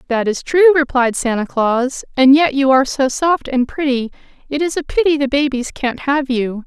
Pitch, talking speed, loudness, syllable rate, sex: 270 Hz, 205 wpm, -16 LUFS, 4.9 syllables/s, female